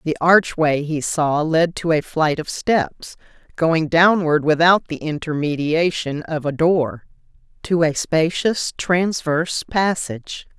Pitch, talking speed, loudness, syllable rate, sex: 160 Hz, 130 wpm, -19 LUFS, 3.8 syllables/s, female